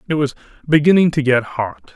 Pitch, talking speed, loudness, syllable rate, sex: 140 Hz, 185 wpm, -16 LUFS, 5.5 syllables/s, male